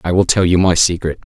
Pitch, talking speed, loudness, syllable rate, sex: 90 Hz, 275 wpm, -14 LUFS, 6.3 syllables/s, male